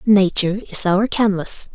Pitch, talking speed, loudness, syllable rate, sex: 195 Hz, 135 wpm, -16 LUFS, 4.4 syllables/s, female